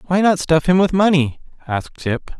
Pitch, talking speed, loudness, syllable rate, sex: 165 Hz, 200 wpm, -17 LUFS, 5.2 syllables/s, male